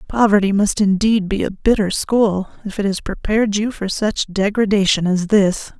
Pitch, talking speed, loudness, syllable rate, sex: 205 Hz, 175 wpm, -17 LUFS, 4.8 syllables/s, female